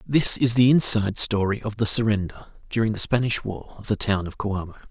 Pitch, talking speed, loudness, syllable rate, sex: 110 Hz, 210 wpm, -21 LUFS, 5.6 syllables/s, male